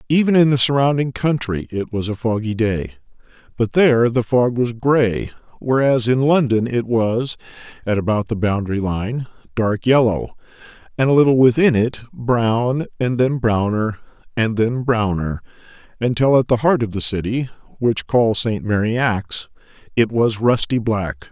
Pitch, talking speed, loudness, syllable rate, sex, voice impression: 120 Hz, 150 wpm, -18 LUFS, 4.6 syllables/s, male, very masculine, very adult-like, old, very thick, slightly relaxed, powerful, slightly bright, soft, muffled, slightly fluent, cool, very intellectual, sincere, very calm, very mature, very friendly, very reassuring, unique, slightly elegant, very wild, slightly sweet, slightly lively, kind, slightly modest